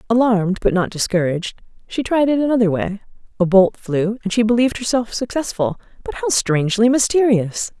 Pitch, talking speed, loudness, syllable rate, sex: 215 Hz, 160 wpm, -18 LUFS, 5.6 syllables/s, female